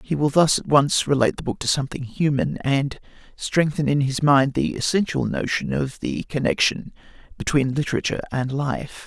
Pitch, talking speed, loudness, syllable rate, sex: 140 Hz, 170 wpm, -22 LUFS, 5.2 syllables/s, male